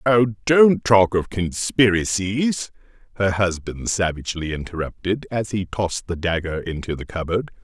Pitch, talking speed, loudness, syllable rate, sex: 100 Hz, 135 wpm, -21 LUFS, 4.5 syllables/s, male